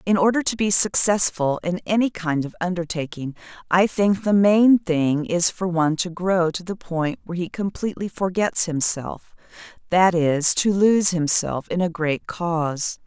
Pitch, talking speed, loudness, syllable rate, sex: 180 Hz, 170 wpm, -20 LUFS, 4.5 syllables/s, female